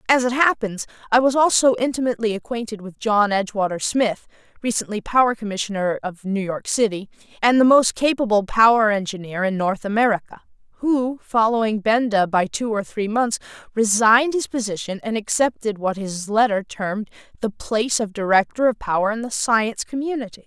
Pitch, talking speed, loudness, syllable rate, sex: 220 Hz, 160 wpm, -20 LUFS, 5.5 syllables/s, female